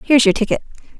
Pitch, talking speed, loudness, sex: 240 Hz, 180 wpm, -16 LUFS, female